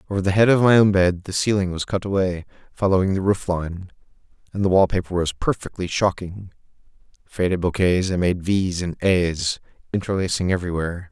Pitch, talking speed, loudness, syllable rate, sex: 95 Hz, 160 wpm, -21 LUFS, 5.6 syllables/s, male